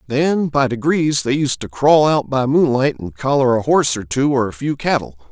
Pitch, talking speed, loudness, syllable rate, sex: 130 Hz, 225 wpm, -17 LUFS, 5.0 syllables/s, male